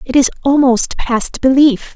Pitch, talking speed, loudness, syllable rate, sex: 260 Hz, 155 wpm, -13 LUFS, 4.1 syllables/s, female